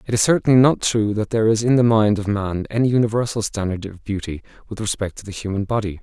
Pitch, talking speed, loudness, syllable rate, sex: 110 Hz, 240 wpm, -19 LUFS, 6.4 syllables/s, male